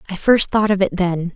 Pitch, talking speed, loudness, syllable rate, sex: 190 Hz, 265 wpm, -17 LUFS, 5.2 syllables/s, female